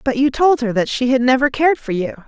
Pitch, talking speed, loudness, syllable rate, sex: 255 Hz, 290 wpm, -16 LUFS, 6.0 syllables/s, female